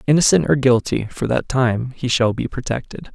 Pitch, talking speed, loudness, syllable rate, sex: 130 Hz, 190 wpm, -18 LUFS, 5.3 syllables/s, male